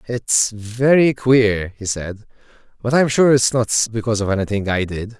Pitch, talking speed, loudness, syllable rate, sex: 115 Hz, 175 wpm, -17 LUFS, 4.6 syllables/s, male